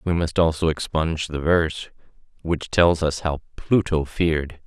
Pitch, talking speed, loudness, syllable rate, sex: 80 Hz, 155 wpm, -22 LUFS, 4.7 syllables/s, male